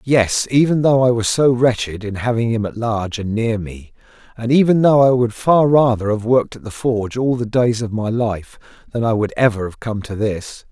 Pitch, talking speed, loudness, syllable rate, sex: 115 Hz, 230 wpm, -17 LUFS, 5.1 syllables/s, male